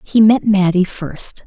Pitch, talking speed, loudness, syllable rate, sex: 195 Hz, 165 wpm, -15 LUFS, 3.7 syllables/s, female